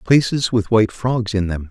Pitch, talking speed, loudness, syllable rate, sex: 110 Hz, 210 wpm, -18 LUFS, 5.0 syllables/s, male